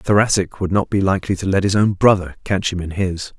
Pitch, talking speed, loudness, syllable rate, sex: 95 Hz, 265 wpm, -18 LUFS, 6.1 syllables/s, male